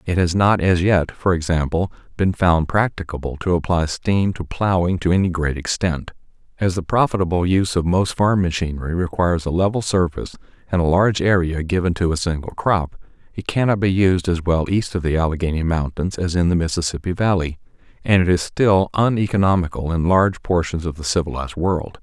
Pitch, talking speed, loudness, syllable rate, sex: 90 Hz, 185 wpm, -19 LUFS, 5.6 syllables/s, male